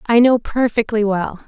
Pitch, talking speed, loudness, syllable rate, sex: 225 Hz, 165 wpm, -17 LUFS, 4.4 syllables/s, female